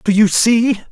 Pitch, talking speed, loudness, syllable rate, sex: 215 Hz, 200 wpm, -13 LUFS, 3.8 syllables/s, male